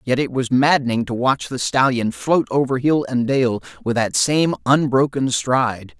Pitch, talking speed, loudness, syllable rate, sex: 125 Hz, 180 wpm, -19 LUFS, 4.5 syllables/s, male